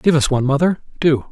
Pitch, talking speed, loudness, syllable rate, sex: 150 Hz, 230 wpm, -17 LUFS, 6.9 syllables/s, male